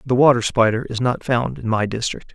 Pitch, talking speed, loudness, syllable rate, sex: 120 Hz, 230 wpm, -19 LUFS, 5.6 syllables/s, male